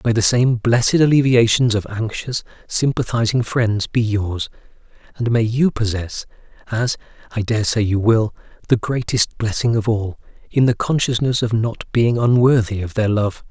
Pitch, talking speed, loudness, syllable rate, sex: 115 Hz, 160 wpm, -18 LUFS, 4.7 syllables/s, male